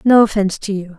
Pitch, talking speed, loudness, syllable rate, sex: 205 Hz, 245 wpm, -16 LUFS, 6.7 syllables/s, female